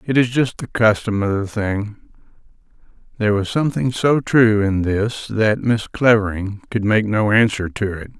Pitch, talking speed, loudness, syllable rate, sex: 110 Hz, 175 wpm, -18 LUFS, 4.7 syllables/s, male